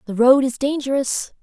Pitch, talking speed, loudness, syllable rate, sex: 260 Hz, 170 wpm, -18 LUFS, 5.0 syllables/s, female